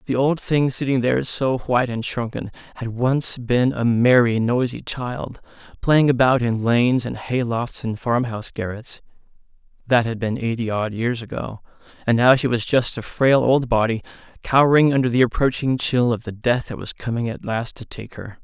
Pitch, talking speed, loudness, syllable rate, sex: 120 Hz, 190 wpm, -20 LUFS, 4.9 syllables/s, male